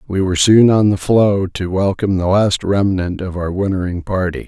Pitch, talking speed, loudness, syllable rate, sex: 95 Hz, 200 wpm, -15 LUFS, 5.1 syllables/s, male